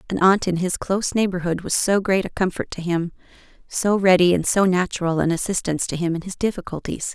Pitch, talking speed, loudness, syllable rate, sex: 180 Hz, 200 wpm, -21 LUFS, 6.0 syllables/s, female